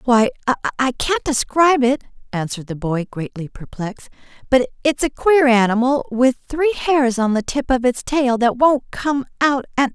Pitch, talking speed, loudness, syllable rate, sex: 255 Hz, 170 wpm, -18 LUFS, 4.9 syllables/s, female